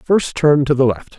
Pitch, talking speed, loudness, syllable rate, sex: 140 Hz, 255 wpm, -15 LUFS, 4.4 syllables/s, male